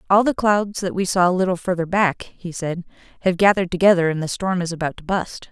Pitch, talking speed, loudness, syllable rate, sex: 180 Hz, 240 wpm, -20 LUFS, 6.0 syllables/s, female